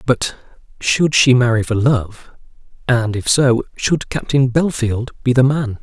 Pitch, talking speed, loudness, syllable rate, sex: 125 Hz, 155 wpm, -16 LUFS, 3.8 syllables/s, male